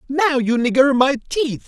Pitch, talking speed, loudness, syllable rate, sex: 265 Hz, 180 wpm, -17 LUFS, 4.4 syllables/s, male